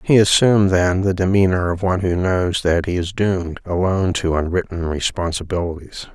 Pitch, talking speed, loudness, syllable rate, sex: 90 Hz, 165 wpm, -18 LUFS, 5.4 syllables/s, male